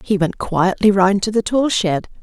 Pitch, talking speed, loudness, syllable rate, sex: 200 Hz, 215 wpm, -17 LUFS, 4.4 syllables/s, female